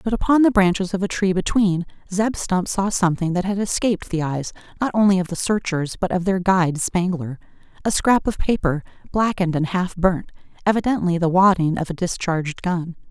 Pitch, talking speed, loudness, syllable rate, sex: 185 Hz, 185 wpm, -20 LUFS, 5.5 syllables/s, female